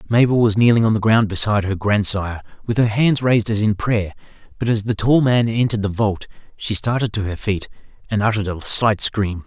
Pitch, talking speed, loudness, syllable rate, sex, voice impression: 110 Hz, 215 wpm, -18 LUFS, 5.8 syllables/s, male, masculine, adult-like, tensed, bright, clear, fluent, cool, intellectual, refreshing, sincere, slightly mature, friendly, reassuring, lively, kind